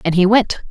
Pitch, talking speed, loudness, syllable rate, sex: 200 Hz, 255 wpm, -14 LUFS, 5.6 syllables/s, female